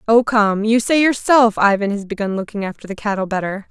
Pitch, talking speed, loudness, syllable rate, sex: 215 Hz, 210 wpm, -17 LUFS, 5.7 syllables/s, female